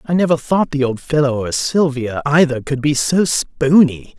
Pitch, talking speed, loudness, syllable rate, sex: 145 Hz, 185 wpm, -16 LUFS, 4.5 syllables/s, male